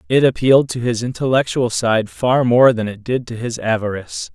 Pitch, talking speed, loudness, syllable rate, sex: 120 Hz, 195 wpm, -17 LUFS, 5.3 syllables/s, male